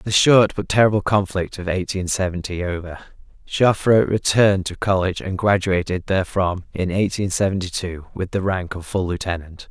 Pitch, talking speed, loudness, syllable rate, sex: 95 Hz, 160 wpm, -20 LUFS, 5.2 syllables/s, male